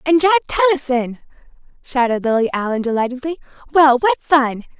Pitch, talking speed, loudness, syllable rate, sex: 270 Hz, 125 wpm, -17 LUFS, 5.7 syllables/s, female